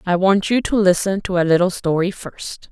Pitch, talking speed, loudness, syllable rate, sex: 185 Hz, 220 wpm, -17 LUFS, 5.0 syllables/s, female